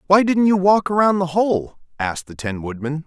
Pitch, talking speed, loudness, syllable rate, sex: 165 Hz, 215 wpm, -19 LUFS, 5.2 syllables/s, male